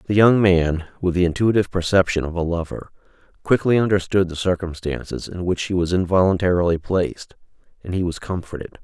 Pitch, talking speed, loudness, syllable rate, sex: 90 Hz, 165 wpm, -20 LUFS, 5.9 syllables/s, male